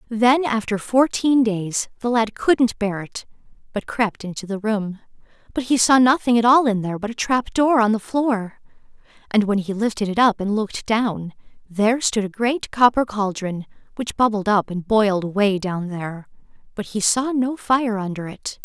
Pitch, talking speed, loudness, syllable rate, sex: 220 Hz, 190 wpm, -20 LUFS, 4.8 syllables/s, female